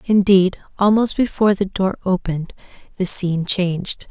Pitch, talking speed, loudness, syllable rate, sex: 190 Hz, 130 wpm, -18 LUFS, 5.2 syllables/s, female